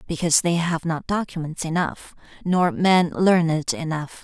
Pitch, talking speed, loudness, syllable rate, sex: 170 Hz, 140 wpm, -21 LUFS, 4.5 syllables/s, female